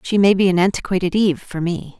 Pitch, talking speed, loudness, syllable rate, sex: 185 Hz, 240 wpm, -18 LUFS, 6.4 syllables/s, female